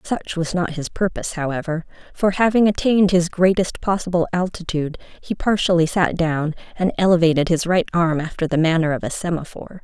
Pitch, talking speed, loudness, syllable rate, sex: 170 Hz, 170 wpm, -20 LUFS, 5.7 syllables/s, female